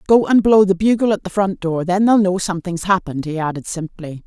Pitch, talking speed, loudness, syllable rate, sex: 185 Hz, 240 wpm, -17 LUFS, 5.8 syllables/s, female